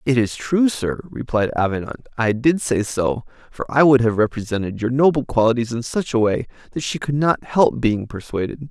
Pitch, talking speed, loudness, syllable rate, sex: 125 Hz, 200 wpm, -20 LUFS, 5.3 syllables/s, male